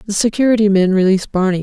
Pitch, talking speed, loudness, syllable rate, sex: 200 Hz, 185 wpm, -14 LUFS, 7.1 syllables/s, female